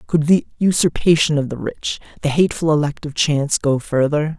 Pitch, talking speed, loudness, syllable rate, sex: 150 Hz, 180 wpm, -18 LUFS, 5.4 syllables/s, male